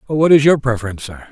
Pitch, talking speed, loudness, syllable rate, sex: 130 Hz, 225 wpm, -14 LUFS, 7.0 syllables/s, male